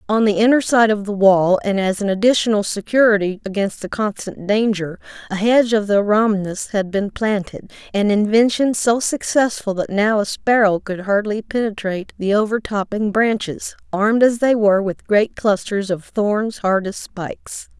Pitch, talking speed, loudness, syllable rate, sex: 210 Hz, 170 wpm, -18 LUFS, 4.8 syllables/s, female